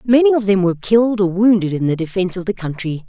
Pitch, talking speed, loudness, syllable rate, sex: 195 Hz, 255 wpm, -16 LUFS, 6.8 syllables/s, female